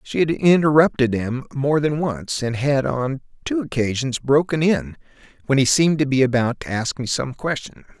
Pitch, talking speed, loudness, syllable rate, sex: 135 Hz, 190 wpm, -20 LUFS, 4.9 syllables/s, male